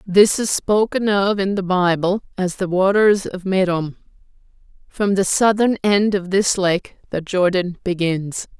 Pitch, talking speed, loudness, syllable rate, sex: 190 Hz, 155 wpm, -18 LUFS, 4.0 syllables/s, female